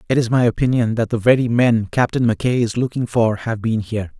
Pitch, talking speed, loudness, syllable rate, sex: 115 Hz, 230 wpm, -18 LUFS, 6.1 syllables/s, male